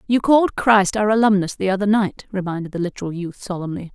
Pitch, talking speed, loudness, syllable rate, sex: 195 Hz, 200 wpm, -19 LUFS, 6.2 syllables/s, female